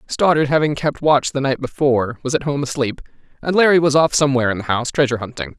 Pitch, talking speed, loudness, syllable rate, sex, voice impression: 135 Hz, 225 wpm, -18 LUFS, 6.8 syllables/s, male, masculine, adult-like, slightly tensed, fluent, intellectual, slightly friendly, lively